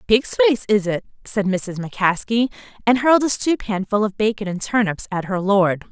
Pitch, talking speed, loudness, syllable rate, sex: 210 Hz, 195 wpm, -20 LUFS, 5.2 syllables/s, female